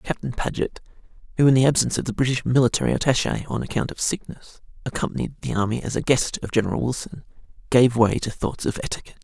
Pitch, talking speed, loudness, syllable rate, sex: 125 Hz, 195 wpm, -22 LUFS, 6.7 syllables/s, male